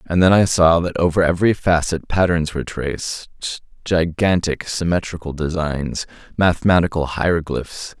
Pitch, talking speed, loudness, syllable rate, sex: 85 Hz, 120 wpm, -19 LUFS, 5.0 syllables/s, male